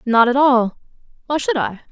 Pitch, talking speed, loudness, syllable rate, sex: 255 Hz, 190 wpm, -17 LUFS, 4.9 syllables/s, female